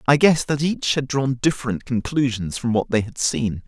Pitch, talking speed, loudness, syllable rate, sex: 130 Hz, 210 wpm, -21 LUFS, 5.1 syllables/s, male